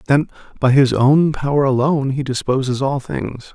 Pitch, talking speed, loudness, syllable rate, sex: 135 Hz, 170 wpm, -17 LUFS, 5.0 syllables/s, male